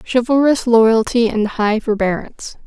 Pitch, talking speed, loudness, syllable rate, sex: 230 Hz, 110 wpm, -15 LUFS, 4.7 syllables/s, female